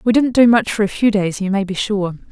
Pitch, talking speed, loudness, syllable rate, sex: 210 Hz, 310 wpm, -16 LUFS, 5.8 syllables/s, female